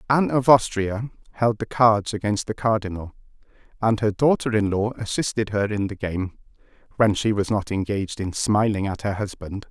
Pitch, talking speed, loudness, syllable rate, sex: 105 Hz, 180 wpm, -22 LUFS, 5.2 syllables/s, male